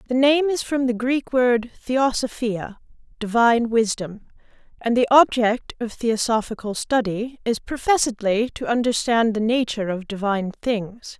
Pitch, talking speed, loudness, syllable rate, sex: 230 Hz, 125 wpm, -21 LUFS, 4.6 syllables/s, female